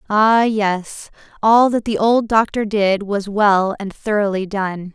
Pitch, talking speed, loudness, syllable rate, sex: 210 Hz, 160 wpm, -17 LUFS, 3.7 syllables/s, female